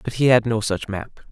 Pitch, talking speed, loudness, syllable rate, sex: 110 Hz, 275 wpm, -20 LUFS, 5.3 syllables/s, male